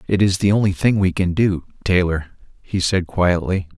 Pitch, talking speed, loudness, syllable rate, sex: 95 Hz, 190 wpm, -19 LUFS, 4.9 syllables/s, male